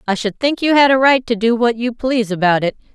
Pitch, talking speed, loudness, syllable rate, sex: 235 Hz, 285 wpm, -15 LUFS, 6.0 syllables/s, female